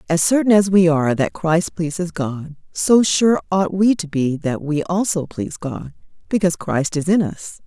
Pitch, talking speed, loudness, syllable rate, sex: 170 Hz, 195 wpm, -18 LUFS, 4.7 syllables/s, female